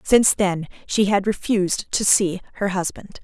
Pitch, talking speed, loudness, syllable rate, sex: 195 Hz, 165 wpm, -20 LUFS, 4.8 syllables/s, female